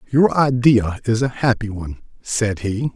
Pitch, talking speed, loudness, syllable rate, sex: 115 Hz, 165 wpm, -18 LUFS, 4.5 syllables/s, male